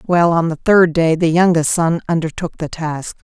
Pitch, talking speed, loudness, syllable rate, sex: 165 Hz, 200 wpm, -16 LUFS, 4.7 syllables/s, female